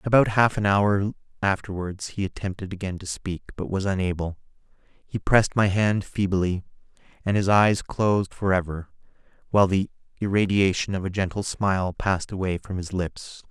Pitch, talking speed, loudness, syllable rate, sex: 95 Hz, 155 wpm, -24 LUFS, 5.1 syllables/s, male